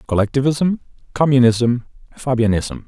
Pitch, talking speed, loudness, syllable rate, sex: 125 Hz, 65 wpm, -17 LUFS, 4.8 syllables/s, male